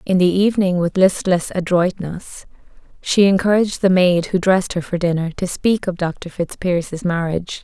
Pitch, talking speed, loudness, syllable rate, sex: 180 Hz, 165 wpm, -18 LUFS, 4.9 syllables/s, female